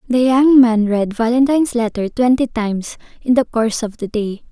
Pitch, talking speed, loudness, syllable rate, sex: 235 Hz, 185 wpm, -16 LUFS, 5.2 syllables/s, female